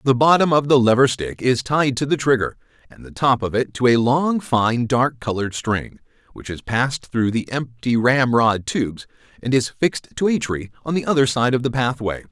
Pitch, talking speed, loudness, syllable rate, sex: 125 Hz, 215 wpm, -19 LUFS, 5.1 syllables/s, male